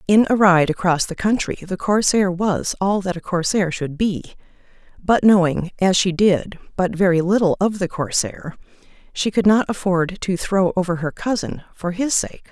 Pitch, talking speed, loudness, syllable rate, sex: 185 Hz, 180 wpm, -19 LUFS, 4.7 syllables/s, female